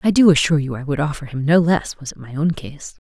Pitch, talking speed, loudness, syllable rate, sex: 150 Hz, 295 wpm, -18 LUFS, 6.2 syllables/s, female